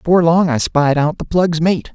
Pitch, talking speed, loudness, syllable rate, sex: 165 Hz, 245 wpm, -15 LUFS, 5.3 syllables/s, male